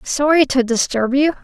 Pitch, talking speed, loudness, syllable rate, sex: 270 Hz, 170 wpm, -16 LUFS, 4.7 syllables/s, female